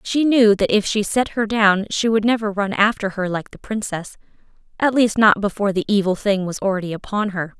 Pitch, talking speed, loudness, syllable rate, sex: 205 Hz, 220 wpm, -19 LUFS, 5.4 syllables/s, female